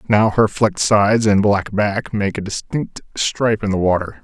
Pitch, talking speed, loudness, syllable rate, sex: 105 Hz, 200 wpm, -17 LUFS, 4.9 syllables/s, male